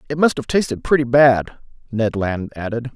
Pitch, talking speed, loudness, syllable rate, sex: 125 Hz, 185 wpm, -18 LUFS, 5.2 syllables/s, male